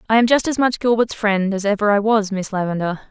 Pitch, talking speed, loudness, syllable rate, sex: 210 Hz, 250 wpm, -18 LUFS, 5.9 syllables/s, female